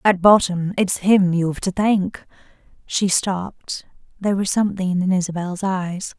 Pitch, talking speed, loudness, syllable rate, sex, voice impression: 190 Hz, 145 wpm, -20 LUFS, 4.5 syllables/s, female, very feminine, very adult-like, very thin, relaxed, slightly weak, slightly bright, very soft, slightly muffled, fluent, slightly raspy, cute, very intellectual, refreshing, very sincere, slightly calm, very friendly, very reassuring, unique, very elegant, slightly wild, very sweet, lively, very kind, modest, light